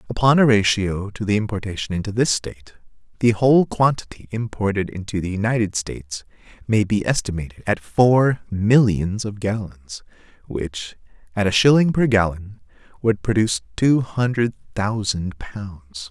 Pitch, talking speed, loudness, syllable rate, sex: 105 Hz, 140 wpm, -20 LUFS, 4.8 syllables/s, male